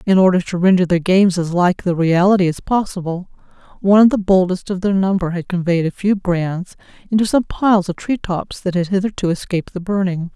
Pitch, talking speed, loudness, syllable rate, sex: 185 Hz, 210 wpm, -17 LUFS, 5.7 syllables/s, female